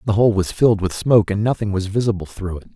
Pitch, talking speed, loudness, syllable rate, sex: 105 Hz, 260 wpm, -19 LUFS, 6.6 syllables/s, male